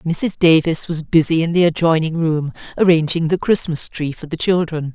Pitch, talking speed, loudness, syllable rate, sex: 165 Hz, 180 wpm, -17 LUFS, 5.0 syllables/s, female